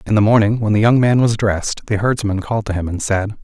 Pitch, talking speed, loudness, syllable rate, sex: 105 Hz, 280 wpm, -16 LUFS, 6.3 syllables/s, male